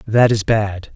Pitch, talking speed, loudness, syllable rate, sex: 105 Hz, 190 wpm, -17 LUFS, 3.7 syllables/s, male